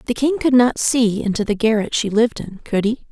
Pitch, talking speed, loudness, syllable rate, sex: 230 Hz, 250 wpm, -18 LUFS, 5.5 syllables/s, female